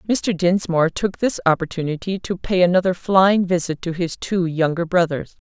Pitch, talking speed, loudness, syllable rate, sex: 175 Hz, 165 wpm, -20 LUFS, 4.8 syllables/s, female